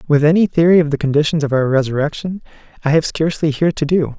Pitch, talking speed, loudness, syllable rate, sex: 155 Hz, 215 wpm, -16 LUFS, 6.9 syllables/s, male